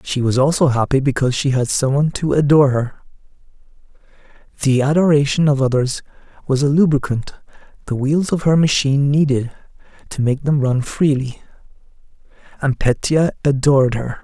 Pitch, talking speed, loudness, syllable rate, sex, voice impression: 140 Hz, 140 wpm, -17 LUFS, 5.6 syllables/s, male, masculine, adult-like, slightly halting, slightly cool, sincere, calm